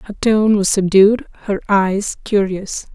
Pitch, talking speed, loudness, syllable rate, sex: 200 Hz, 145 wpm, -16 LUFS, 3.5 syllables/s, female